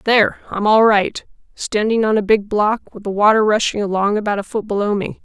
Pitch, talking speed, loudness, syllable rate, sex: 210 Hz, 205 wpm, -17 LUFS, 5.5 syllables/s, female